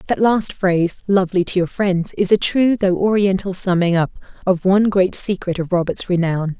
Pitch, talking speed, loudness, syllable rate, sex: 185 Hz, 190 wpm, -18 LUFS, 5.3 syllables/s, female